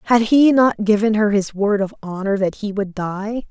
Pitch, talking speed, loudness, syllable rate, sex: 210 Hz, 225 wpm, -18 LUFS, 4.6 syllables/s, female